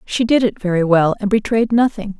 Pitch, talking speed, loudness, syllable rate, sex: 210 Hz, 220 wpm, -16 LUFS, 5.4 syllables/s, female